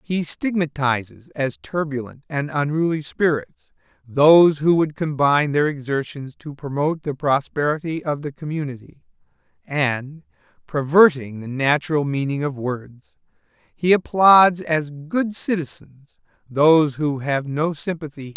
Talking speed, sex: 135 wpm, male